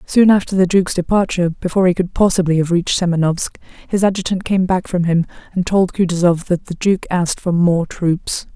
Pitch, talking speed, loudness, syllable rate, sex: 180 Hz, 180 wpm, -16 LUFS, 5.8 syllables/s, female